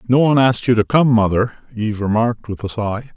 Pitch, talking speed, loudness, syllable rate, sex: 115 Hz, 230 wpm, -17 LUFS, 6.6 syllables/s, male